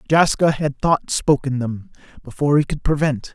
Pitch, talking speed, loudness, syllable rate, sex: 140 Hz, 160 wpm, -19 LUFS, 4.9 syllables/s, male